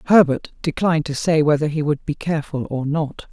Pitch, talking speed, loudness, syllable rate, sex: 155 Hz, 200 wpm, -20 LUFS, 5.6 syllables/s, female